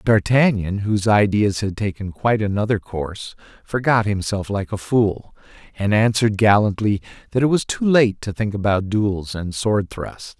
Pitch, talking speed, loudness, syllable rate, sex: 105 Hz, 165 wpm, -20 LUFS, 4.8 syllables/s, male